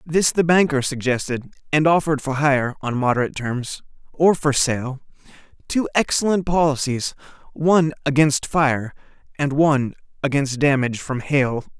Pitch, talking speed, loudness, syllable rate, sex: 140 Hz, 130 wpm, -20 LUFS, 4.5 syllables/s, male